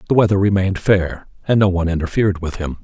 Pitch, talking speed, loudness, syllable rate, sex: 95 Hz, 210 wpm, -17 LUFS, 7.1 syllables/s, male